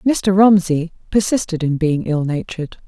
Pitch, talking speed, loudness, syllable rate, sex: 175 Hz, 145 wpm, -17 LUFS, 4.6 syllables/s, female